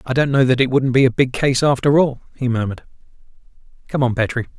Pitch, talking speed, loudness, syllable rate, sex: 130 Hz, 220 wpm, -17 LUFS, 6.5 syllables/s, male